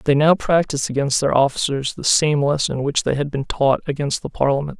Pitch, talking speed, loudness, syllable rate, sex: 145 Hz, 215 wpm, -19 LUFS, 5.5 syllables/s, male